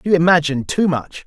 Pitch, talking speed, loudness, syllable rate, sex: 160 Hz, 190 wpm, -17 LUFS, 6.0 syllables/s, male